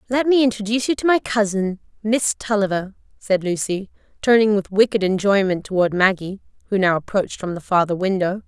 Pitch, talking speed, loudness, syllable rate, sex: 205 Hz, 170 wpm, -19 LUFS, 5.7 syllables/s, female